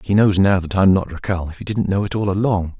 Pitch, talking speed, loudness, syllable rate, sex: 95 Hz, 300 wpm, -18 LUFS, 6.0 syllables/s, male